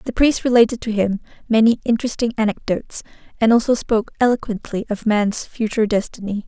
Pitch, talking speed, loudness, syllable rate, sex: 225 Hz, 150 wpm, -19 LUFS, 6.2 syllables/s, female